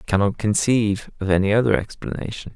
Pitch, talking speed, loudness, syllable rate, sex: 100 Hz, 165 wpm, -21 LUFS, 6.2 syllables/s, male